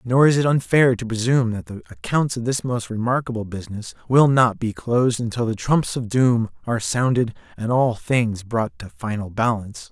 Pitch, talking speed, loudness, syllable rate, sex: 115 Hz, 195 wpm, -21 LUFS, 5.2 syllables/s, male